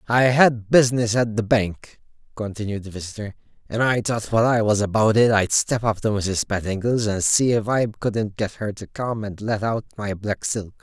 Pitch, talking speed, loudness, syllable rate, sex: 110 Hz, 210 wpm, -21 LUFS, 5.0 syllables/s, male